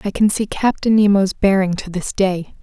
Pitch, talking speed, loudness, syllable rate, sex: 200 Hz, 205 wpm, -17 LUFS, 4.9 syllables/s, female